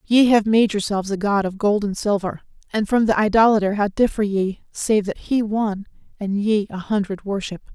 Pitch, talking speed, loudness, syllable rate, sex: 205 Hz, 200 wpm, -20 LUFS, 5.3 syllables/s, female